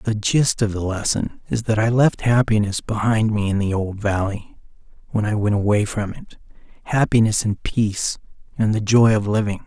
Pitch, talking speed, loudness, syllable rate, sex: 105 Hz, 185 wpm, -20 LUFS, 4.9 syllables/s, male